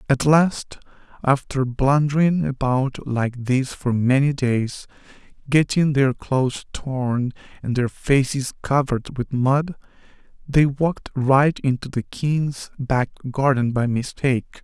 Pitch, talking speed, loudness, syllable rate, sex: 135 Hz, 125 wpm, -21 LUFS, 3.8 syllables/s, male